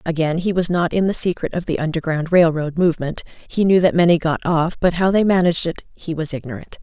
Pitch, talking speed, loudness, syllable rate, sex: 170 Hz, 235 wpm, -18 LUFS, 6.0 syllables/s, female